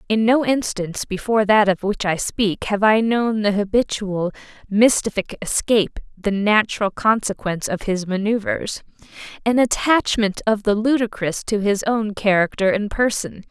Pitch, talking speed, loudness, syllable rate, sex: 210 Hz, 140 wpm, -19 LUFS, 4.8 syllables/s, female